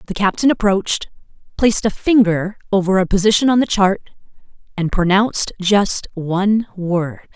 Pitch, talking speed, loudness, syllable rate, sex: 195 Hz, 140 wpm, -17 LUFS, 5.1 syllables/s, female